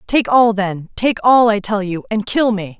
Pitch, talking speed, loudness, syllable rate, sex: 215 Hz, 215 wpm, -15 LUFS, 4.4 syllables/s, female